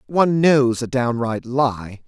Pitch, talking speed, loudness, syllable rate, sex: 125 Hz, 145 wpm, -19 LUFS, 3.7 syllables/s, male